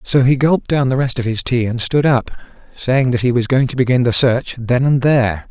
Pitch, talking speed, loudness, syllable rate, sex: 125 Hz, 260 wpm, -15 LUFS, 5.4 syllables/s, male